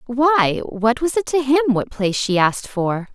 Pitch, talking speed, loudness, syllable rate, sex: 250 Hz, 210 wpm, -18 LUFS, 4.6 syllables/s, female